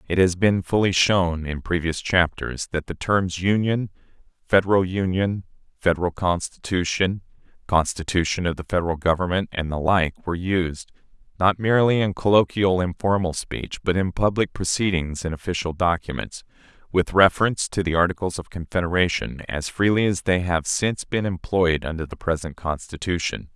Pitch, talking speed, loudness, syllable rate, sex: 90 Hz, 145 wpm, -22 LUFS, 5.2 syllables/s, male